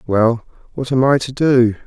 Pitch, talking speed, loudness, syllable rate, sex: 125 Hz, 195 wpm, -16 LUFS, 4.4 syllables/s, male